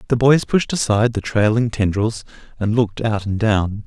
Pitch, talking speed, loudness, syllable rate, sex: 110 Hz, 185 wpm, -18 LUFS, 5.1 syllables/s, male